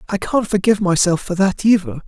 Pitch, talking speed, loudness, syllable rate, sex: 190 Hz, 205 wpm, -17 LUFS, 5.9 syllables/s, male